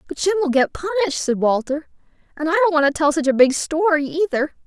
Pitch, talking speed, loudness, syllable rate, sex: 305 Hz, 230 wpm, -19 LUFS, 6.9 syllables/s, female